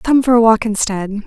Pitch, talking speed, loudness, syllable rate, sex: 220 Hz, 235 wpm, -14 LUFS, 5.0 syllables/s, female